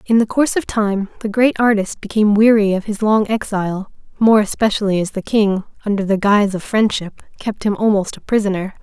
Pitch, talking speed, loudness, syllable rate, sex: 210 Hz, 195 wpm, -17 LUFS, 5.8 syllables/s, female